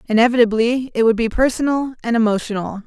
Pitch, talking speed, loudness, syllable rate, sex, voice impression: 230 Hz, 145 wpm, -17 LUFS, 6.3 syllables/s, female, feminine, adult-like, tensed, bright, clear, friendly, slightly reassuring, unique, lively, slightly intense, slightly sharp, slightly light